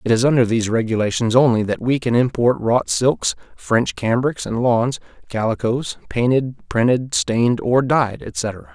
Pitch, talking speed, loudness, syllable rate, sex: 120 Hz, 160 wpm, -19 LUFS, 4.5 syllables/s, male